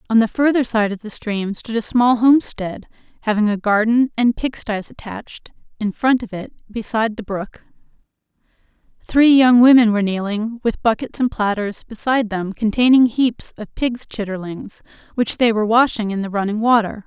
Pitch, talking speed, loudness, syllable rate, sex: 225 Hz, 170 wpm, -18 LUFS, 5.1 syllables/s, female